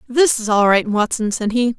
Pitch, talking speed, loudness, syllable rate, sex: 230 Hz, 235 wpm, -17 LUFS, 4.9 syllables/s, female